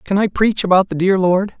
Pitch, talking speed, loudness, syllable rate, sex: 190 Hz, 265 wpm, -15 LUFS, 5.4 syllables/s, male